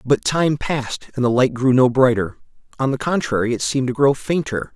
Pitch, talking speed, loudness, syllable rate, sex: 130 Hz, 215 wpm, -19 LUFS, 5.6 syllables/s, male